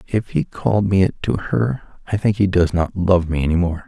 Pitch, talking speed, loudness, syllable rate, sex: 95 Hz, 265 wpm, -19 LUFS, 5.6 syllables/s, male